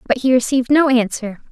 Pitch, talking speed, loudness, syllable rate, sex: 250 Hz, 200 wpm, -16 LUFS, 6.4 syllables/s, female